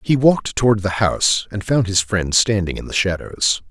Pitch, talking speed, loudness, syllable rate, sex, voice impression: 105 Hz, 210 wpm, -18 LUFS, 5.1 syllables/s, male, masculine, middle-aged, tensed, powerful, fluent, intellectual, calm, mature, friendly, unique, wild, lively, slightly strict